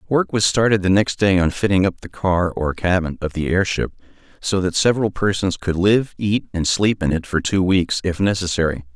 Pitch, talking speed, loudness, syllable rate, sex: 95 Hz, 215 wpm, -19 LUFS, 5.2 syllables/s, male